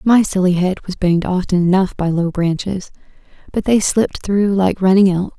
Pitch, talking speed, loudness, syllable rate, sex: 190 Hz, 190 wpm, -16 LUFS, 5.2 syllables/s, female